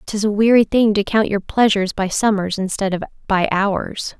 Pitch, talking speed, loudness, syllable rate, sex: 205 Hz, 200 wpm, -18 LUFS, 5.0 syllables/s, female